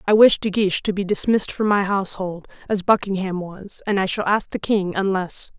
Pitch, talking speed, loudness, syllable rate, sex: 195 Hz, 215 wpm, -21 LUFS, 5.5 syllables/s, female